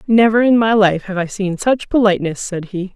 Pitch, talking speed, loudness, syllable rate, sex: 200 Hz, 225 wpm, -16 LUFS, 5.3 syllables/s, female